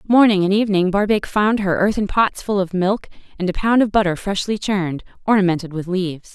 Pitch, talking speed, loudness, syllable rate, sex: 195 Hz, 200 wpm, -18 LUFS, 5.8 syllables/s, female